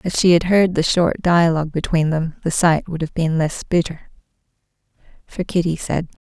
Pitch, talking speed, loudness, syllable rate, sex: 165 Hz, 180 wpm, -18 LUFS, 5.0 syllables/s, female